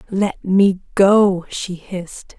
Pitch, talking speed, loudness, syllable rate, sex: 190 Hz, 125 wpm, -17 LUFS, 3.0 syllables/s, female